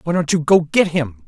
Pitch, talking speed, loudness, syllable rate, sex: 160 Hz, 280 wpm, -17 LUFS, 5.2 syllables/s, male